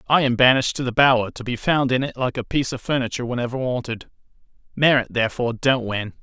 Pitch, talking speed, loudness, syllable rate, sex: 125 Hz, 210 wpm, -20 LUFS, 6.8 syllables/s, male